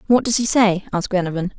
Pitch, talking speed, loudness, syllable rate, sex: 200 Hz, 225 wpm, -18 LUFS, 6.7 syllables/s, female